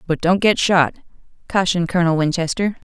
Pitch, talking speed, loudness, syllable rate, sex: 175 Hz, 145 wpm, -18 LUFS, 6.1 syllables/s, female